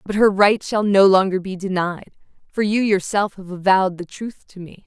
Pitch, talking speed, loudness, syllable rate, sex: 195 Hz, 210 wpm, -18 LUFS, 5.0 syllables/s, female